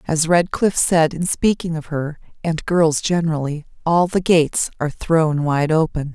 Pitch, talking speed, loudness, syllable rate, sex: 160 Hz, 145 wpm, -18 LUFS, 4.6 syllables/s, female